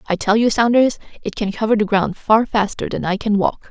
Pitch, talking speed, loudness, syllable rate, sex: 210 Hz, 245 wpm, -17 LUFS, 5.4 syllables/s, female